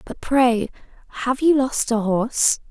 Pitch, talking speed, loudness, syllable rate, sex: 245 Hz, 155 wpm, -20 LUFS, 4.1 syllables/s, female